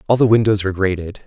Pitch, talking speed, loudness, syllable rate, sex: 100 Hz, 235 wpm, -17 LUFS, 7.3 syllables/s, male